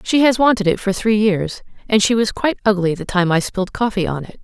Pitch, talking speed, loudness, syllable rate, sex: 205 Hz, 255 wpm, -17 LUFS, 6.0 syllables/s, female